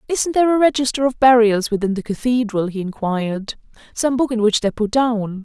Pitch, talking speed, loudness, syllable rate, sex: 230 Hz, 200 wpm, -18 LUFS, 5.7 syllables/s, female